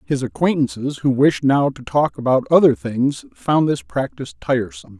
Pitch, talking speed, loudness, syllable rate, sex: 135 Hz, 170 wpm, -18 LUFS, 5.0 syllables/s, male